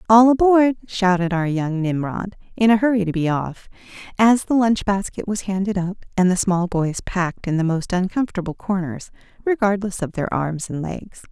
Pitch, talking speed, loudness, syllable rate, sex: 195 Hz, 185 wpm, -20 LUFS, 5.0 syllables/s, female